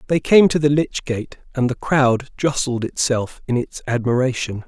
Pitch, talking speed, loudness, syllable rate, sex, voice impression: 130 Hz, 180 wpm, -19 LUFS, 4.6 syllables/s, male, masculine, middle-aged, relaxed, slightly weak, slightly halting, raspy, calm, slightly mature, friendly, reassuring, slightly wild, kind, modest